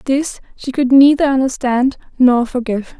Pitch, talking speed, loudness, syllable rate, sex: 260 Hz, 140 wpm, -14 LUFS, 4.8 syllables/s, female